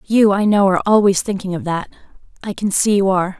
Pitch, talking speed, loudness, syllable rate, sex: 195 Hz, 210 wpm, -16 LUFS, 6.3 syllables/s, female